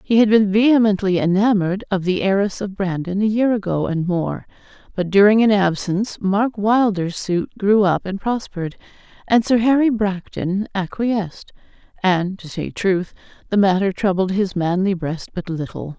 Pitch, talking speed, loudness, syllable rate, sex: 195 Hz, 160 wpm, -19 LUFS, 4.8 syllables/s, female